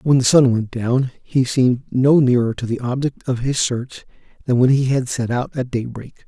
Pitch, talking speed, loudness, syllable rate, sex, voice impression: 125 Hz, 220 wpm, -18 LUFS, 4.8 syllables/s, male, masculine, slightly old, slightly thick, soft, sincere, very calm